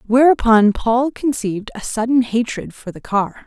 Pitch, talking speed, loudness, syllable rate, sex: 235 Hz, 155 wpm, -17 LUFS, 4.6 syllables/s, female